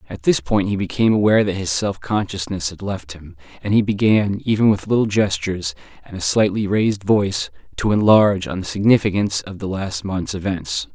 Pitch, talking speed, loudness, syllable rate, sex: 95 Hz, 190 wpm, -19 LUFS, 5.6 syllables/s, male